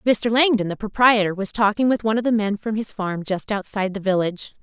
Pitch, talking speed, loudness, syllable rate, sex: 210 Hz, 235 wpm, -21 LUFS, 6.1 syllables/s, female